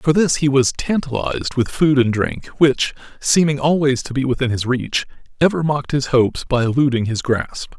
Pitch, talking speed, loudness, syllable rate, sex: 135 Hz, 195 wpm, -18 LUFS, 5.2 syllables/s, male